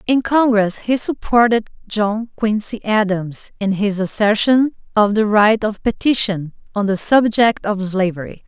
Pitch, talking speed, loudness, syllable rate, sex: 215 Hz, 140 wpm, -17 LUFS, 4.2 syllables/s, female